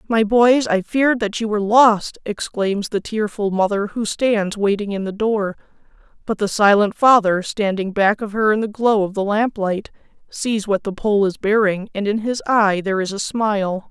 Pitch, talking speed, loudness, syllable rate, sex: 210 Hz, 200 wpm, -18 LUFS, 4.7 syllables/s, female